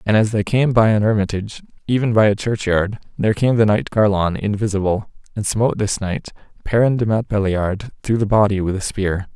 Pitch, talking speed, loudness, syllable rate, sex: 105 Hz, 190 wpm, -18 LUFS, 5.6 syllables/s, male